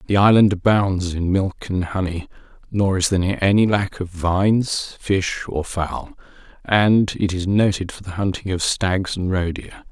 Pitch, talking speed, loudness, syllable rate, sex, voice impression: 95 Hz, 175 wpm, -20 LUFS, 4.3 syllables/s, male, very masculine, very thick, slightly tensed, very powerful, slightly bright, very soft, very muffled, slightly halting, very raspy, very cool, intellectual, slightly refreshing, sincere, calm, very mature, friendly, very reassuring, very unique, elegant, very wild, sweet, lively, very kind, slightly modest